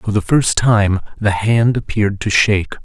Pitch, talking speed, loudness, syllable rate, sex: 105 Hz, 190 wpm, -15 LUFS, 4.8 syllables/s, male